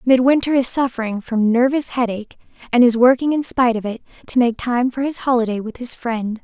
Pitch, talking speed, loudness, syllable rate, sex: 245 Hz, 205 wpm, -18 LUFS, 5.8 syllables/s, female